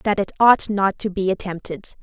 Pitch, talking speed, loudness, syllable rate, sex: 195 Hz, 205 wpm, -19 LUFS, 5.1 syllables/s, female